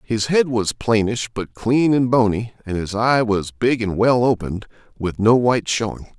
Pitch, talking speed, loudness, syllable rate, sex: 115 Hz, 195 wpm, -19 LUFS, 4.7 syllables/s, male